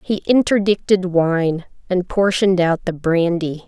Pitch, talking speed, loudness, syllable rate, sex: 180 Hz, 130 wpm, -17 LUFS, 4.3 syllables/s, female